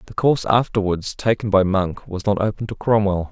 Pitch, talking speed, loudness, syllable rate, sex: 100 Hz, 200 wpm, -20 LUFS, 5.4 syllables/s, male